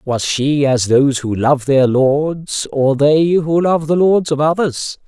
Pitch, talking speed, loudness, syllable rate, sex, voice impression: 145 Hz, 190 wpm, -14 LUFS, 3.7 syllables/s, male, masculine, adult-like, slightly middle-aged, thick, tensed, slightly powerful, slightly bright, slightly soft, slightly muffled, fluent, cool, slightly intellectual, slightly refreshing, slightly sincere, calm, slightly mature, friendly, slightly reassuring, wild, slightly lively, kind, slightly light